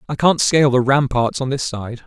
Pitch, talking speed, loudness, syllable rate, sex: 130 Hz, 230 wpm, -17 LUFS, 5.4 syllables/s, male